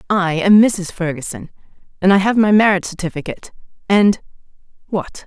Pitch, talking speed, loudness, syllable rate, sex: 185 Hz, 125 wpm, -16 LUFS, 5.6 syllables/s, female